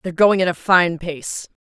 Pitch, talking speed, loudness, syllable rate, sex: 175 Hz, 220 wpm, -18 LUFS, 5.0 syllables/s, female